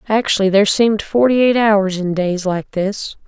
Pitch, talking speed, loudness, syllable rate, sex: 205 Hz, 185 wpm, -15 LUFS, 5.0 syllables/s, female